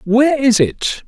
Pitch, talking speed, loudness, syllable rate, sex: 230 Hz, 170 wpm, -14 LUFS, 4.0 syllables/s, male